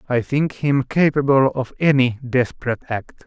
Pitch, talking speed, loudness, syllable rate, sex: 130 Hz, 145 wpm, -19 LUFS, 4.8 syllables/s, male